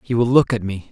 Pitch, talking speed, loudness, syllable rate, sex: 115 Hz, 330 wpm, -18 LUFS, 6.2 syllables/s, male